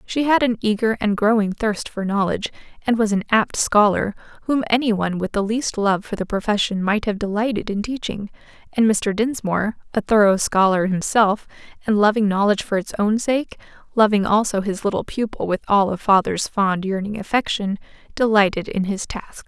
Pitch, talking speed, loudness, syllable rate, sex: 210 Hz, 175 wpm, -20 LUFS, 5.3 syllables/s, female